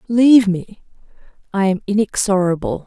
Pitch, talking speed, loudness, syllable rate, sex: 205 Hz, 105 wpm, -16 LUFS, 5.0 syllables/s, female